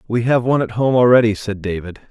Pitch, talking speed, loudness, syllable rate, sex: 115 Hz, 230 wpm, -16 LUFS, 6.4 syllables/s, male